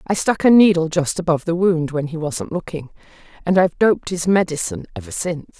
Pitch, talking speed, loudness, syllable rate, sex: 175 Hz, 205 wpm, -18 LUFS, 6.3 syllables/s, female